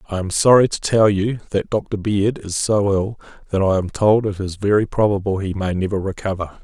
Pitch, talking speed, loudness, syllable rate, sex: 100 Hz, 215 wpm, -19 LUFS, 5.2 syllables/s, male